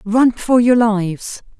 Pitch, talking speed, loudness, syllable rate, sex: 225 Hz, 150 wpm, -15 LUFS, 3.7 syllables/s, female